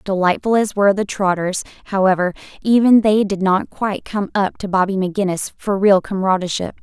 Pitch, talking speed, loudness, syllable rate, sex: 195 Hz, 165 wpm, -17 LUFS, 5.6 syllables/s, female